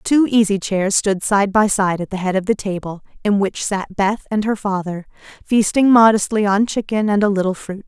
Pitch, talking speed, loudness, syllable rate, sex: 200 Hz, 215 wpm, -17 LUFS, 5.0 syllables/s, female